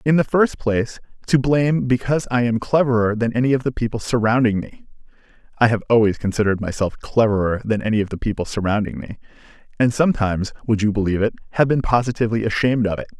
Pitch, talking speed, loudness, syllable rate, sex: 115 Hz, 190 wpm, -19 LUFS, 6.9 syllables/s, male